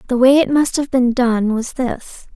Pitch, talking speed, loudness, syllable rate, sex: 250 Hz, 230 wpm, -16 LUFS, 4.3 syllables/s, female